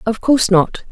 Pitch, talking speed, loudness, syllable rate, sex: 215 Hz, 195 wpm, -14 LUFS, 5.2 syllables/s, female